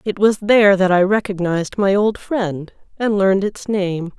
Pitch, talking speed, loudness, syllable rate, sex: 195 Hz, 185 wpm, -17 LUFS, 4.7 syllables/s, female